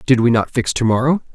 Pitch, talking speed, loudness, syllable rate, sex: 125 Hz, 265 wpm, -16 LUFS, 6.1 syllables/s, male